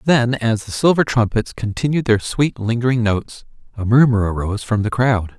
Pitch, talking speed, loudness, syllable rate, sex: 115 Hz, 180 wpm, -18 LUFS, 5.3 syllables/s, male